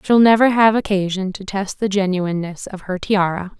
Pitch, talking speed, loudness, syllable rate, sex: 195 Hz, 185 wpm, -18 LUFS, 5.2 syllables/s, female